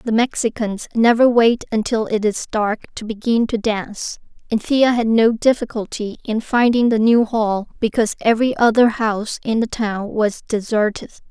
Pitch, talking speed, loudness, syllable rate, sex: 225 Hz, 165 wpm, -18 LUFS, 4.9 syllables/s, female